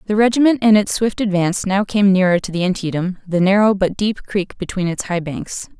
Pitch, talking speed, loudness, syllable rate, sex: 195 Hz, 220 wpm, -17 LUFS, 5.5 syllables/s, female